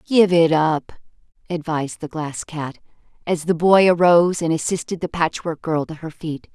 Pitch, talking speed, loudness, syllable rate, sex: 165 Hz, 175 wpm, -20 LUFS, 4.8 syllables/s, female